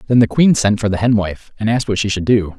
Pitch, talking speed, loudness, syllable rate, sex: 105 Hz, 325 wpm, -16 LUFS, 6.4 syllables/s, male